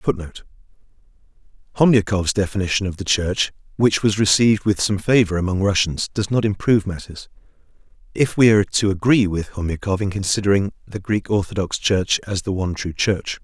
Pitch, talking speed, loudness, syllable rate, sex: 100 Hz, 160 wpm, -19 LUFS, 5.6 syllables/s, male